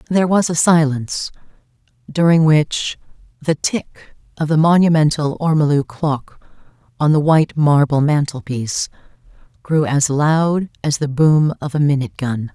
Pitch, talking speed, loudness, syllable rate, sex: 150 Hz, 135 wpm, -16 LUFS, 4.6 syllables/s, female